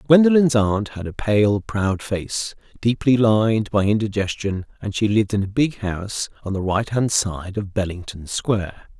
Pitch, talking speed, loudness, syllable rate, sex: 105 Hz, 165 wpm, -21 LUFS, 4.6 syllables/s, male